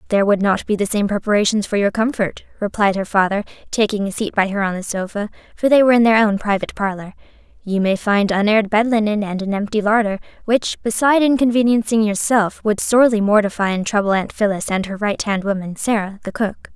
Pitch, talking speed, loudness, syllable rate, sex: 210 Hz, 205 wpm, -18 LUFS, 6.1 syllables/s, female